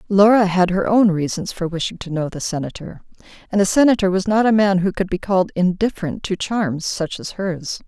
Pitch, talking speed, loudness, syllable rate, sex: 190 Hz, 215 wpm, -19 LUFS, 5.5 syllables/s, female